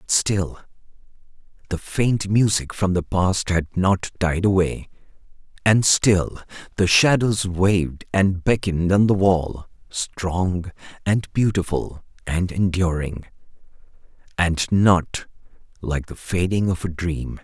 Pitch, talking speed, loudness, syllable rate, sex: 90 Hz, 120 wpm, -21 LUFS, 3.7 syllables/s, male